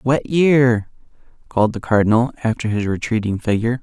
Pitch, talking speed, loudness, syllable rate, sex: 115 Hz, 140 wpm, -18 LUFS, 5.5 syllables/s, male